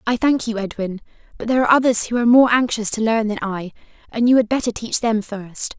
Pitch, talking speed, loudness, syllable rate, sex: 225 Hz, 240 wpm, -18 LUFS, 6.1 syllables/s, female